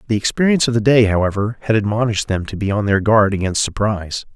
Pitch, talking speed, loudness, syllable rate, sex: 105 Hz, 220 wpm, -17 LUFS, 6.8 syllables/s, male